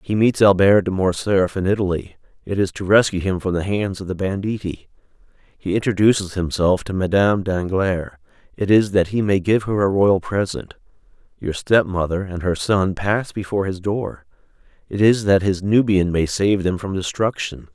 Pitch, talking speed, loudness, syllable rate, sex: 95 Hz, 170 wpm, -19 LUFS, 5.0 syllables/s, male